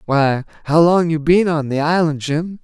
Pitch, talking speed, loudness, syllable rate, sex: 155 Hz, 205 wpm, -16 LUFS, 4.4 syllables/s, male